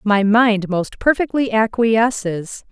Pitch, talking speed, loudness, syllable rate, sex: 220 Hz, 110 wpm, -17 LUFS, 3.5 syllables/s, female